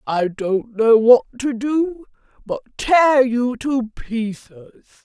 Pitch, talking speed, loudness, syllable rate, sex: 240 Hz, 130 wpm, -18 LUFS, 3.0 syllables/s, female